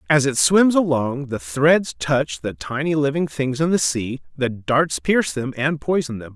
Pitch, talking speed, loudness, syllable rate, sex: 140 Hz, 200 wpm, -20 LUFS, 4.4 syllables/s, male